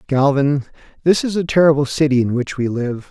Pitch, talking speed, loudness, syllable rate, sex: 140 Hz, 195 wpm, -17 LUFS, 5.4 syllables/s, male